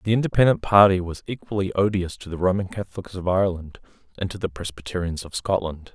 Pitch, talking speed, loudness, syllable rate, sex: 95 Hz, 180 wpm, -23 LUFS, 6.3 syllables/s, male